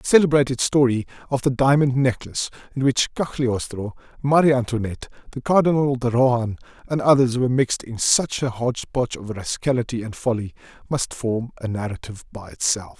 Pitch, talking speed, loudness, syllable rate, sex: 125 Hz, 160 wpm, -21 LUFS, 5.8 syllables/s, male